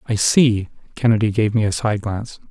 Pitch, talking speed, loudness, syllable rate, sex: 110 Hz, 190 wpm, -18 LUFS, 5.3 syllables/s, male